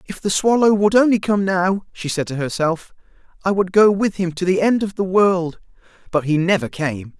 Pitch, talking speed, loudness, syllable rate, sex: 185 Hz, 215 wpm, -18 LUFS, 5.0 syllables/s, male